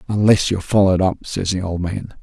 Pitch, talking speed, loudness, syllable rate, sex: 95 Hz, 215 wpm, -18 LUFS, 6.1 syllables/s, male